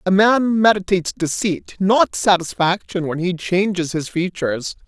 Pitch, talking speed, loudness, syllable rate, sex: 185 Hz, 135 wpm, -18 LUFS, 4.5 syllables/s, male